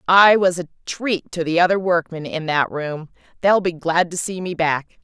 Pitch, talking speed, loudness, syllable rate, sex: 175 Hz, 215 wpm, -19 LUFS, 4.6 syllables/s, female